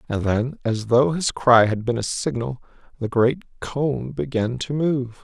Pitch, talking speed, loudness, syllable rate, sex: 125 Hz, 185 wpm, -22 LUFS, 3.9 syllables/s, male